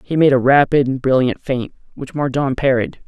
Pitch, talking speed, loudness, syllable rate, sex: 135 Hz, 195 wpm, -16 LUFS, 5.1 syllables/s, male